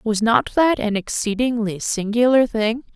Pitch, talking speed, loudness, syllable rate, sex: 225 Hz, 140 wpm, -19 LUFS, 4.3 syllables/s, female